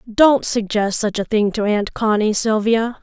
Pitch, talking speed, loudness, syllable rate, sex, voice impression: 220 Hz, 180 wpm, -18 LUFS, 4.2 syllables/s, female, feminine, slightly adult-like, slightly clear, slightly intellectual, slightly elegant